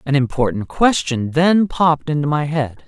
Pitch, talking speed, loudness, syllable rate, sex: 150 Hz, 165 wpm, -17 LUFS, 4.7 syllables/s, male